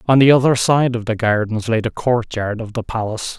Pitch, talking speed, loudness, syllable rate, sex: 115 Hz, 230 wpm, -17 LUFS, 5.6 syllables/s, male